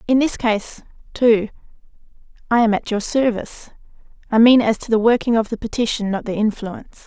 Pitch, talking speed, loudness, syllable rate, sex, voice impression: 225 Hz, 180 wpm, -18 LUFS, 5.6 syllables/s, female, very feminine, slightly young, very adult-like, very thin, slightly tensed, slightly powerful, bright, hard, clear, very fluent, raspy, cute, slightly cool, intellectual, refreshing, slightly sincere, slightly calm, friendly, reassuring, very unique, slightly elegant, wild, slightly sweet, lively, slightly kind, slightly intense, sharp, slightly modest, light